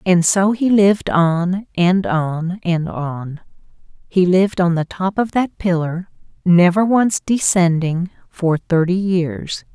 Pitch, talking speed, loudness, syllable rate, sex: 180 Hz, 135 wpm, -17 LUFS, 3.6 syllables/s, female